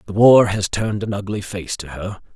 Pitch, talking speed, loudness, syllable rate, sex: 100 Hz, 230 wpm, -18 LUFS, 5.3 syllables/s, male